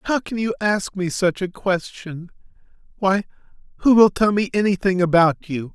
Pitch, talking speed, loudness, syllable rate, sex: 190 Hz, 165 wpm, -19 LUFS, 4.8 syllables/s, male